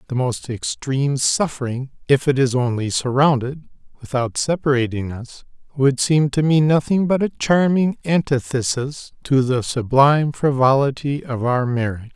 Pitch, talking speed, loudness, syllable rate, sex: 135 Hz, 140 wpm, -19 LUFS, 4.7 syllables/s, male